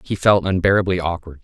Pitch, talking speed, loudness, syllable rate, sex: 90 Hz, 165 wpm, -18 LUFS, 6.0 syllables/s, male